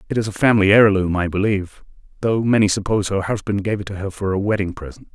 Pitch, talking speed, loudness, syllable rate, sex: 100 Hz, 235 wpm, -19 LUFS, 6.8 syllables/s, male